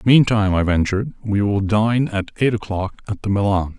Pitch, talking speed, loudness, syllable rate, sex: 105 Hz, 190 wpm, -19 LUFS, 5.5 syllables/s, male